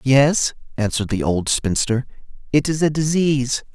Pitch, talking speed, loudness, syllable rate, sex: 130 Hz, 145 wpm, -19 LUFS, 4.9 syllables/s, male